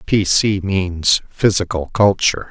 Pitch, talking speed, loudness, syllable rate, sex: 95 Hz, 120 wpm, -16 LUFS, 3.9 syllables/s, male